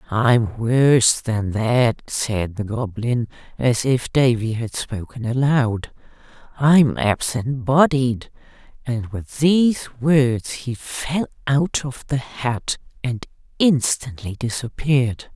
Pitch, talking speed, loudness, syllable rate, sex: 130 Hz, 115 wpm, -20 LUFS, 3.3 syllables/s, female